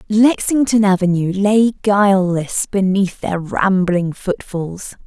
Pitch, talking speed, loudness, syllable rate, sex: 195 Hz, 95 wpm, -16 LUFS, 3.6 syllables/s, female